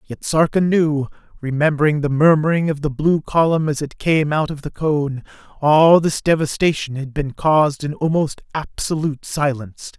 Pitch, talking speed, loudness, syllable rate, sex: 150 Hz, 160 wpm, -18 LUFS, 4.9 syllables/s, male